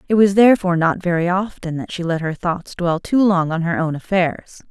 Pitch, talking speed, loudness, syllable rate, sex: 180 Hz, 230 wpm, -18 LUFS, 5.4 syllables/s, female